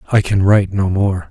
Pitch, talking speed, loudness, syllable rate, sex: 95 Hz, 230 wpm, -15 LUFS, 5.6 syllables/s, male